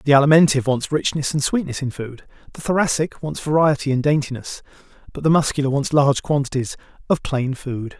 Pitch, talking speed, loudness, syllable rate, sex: 140 Hz, 175 wpm, -20 LUFS, 5.9 syllables/s, male